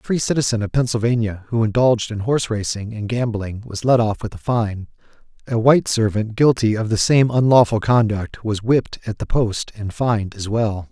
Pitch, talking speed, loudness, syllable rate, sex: 110 Hz, 200 wpm, -19 LUFS, 5.4 syllables/s, male